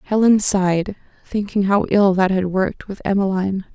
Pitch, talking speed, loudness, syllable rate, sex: 195 Hz, 160 wpm, -18 LUFS, 5.3 syllables/s, female